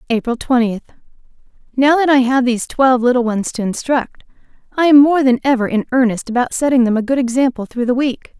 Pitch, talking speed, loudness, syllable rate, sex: 250 Hz, 195 wpm, -15 LUFS, 6.0 syllables/s, female